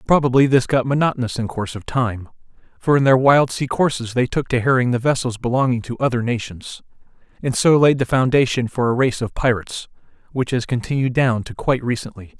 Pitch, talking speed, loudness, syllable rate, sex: 125 Hz, 200 wpm, -19 LUFS, 5.9 syllables/s, male